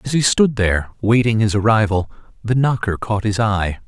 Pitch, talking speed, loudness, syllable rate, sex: 110 Hz, 185 wpm, -17 LUFS, 5.3 syllables/s, male